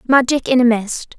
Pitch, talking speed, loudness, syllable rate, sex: 245 Hz, 205 wpm, -15 LUFS, 4.9 syllables/s, female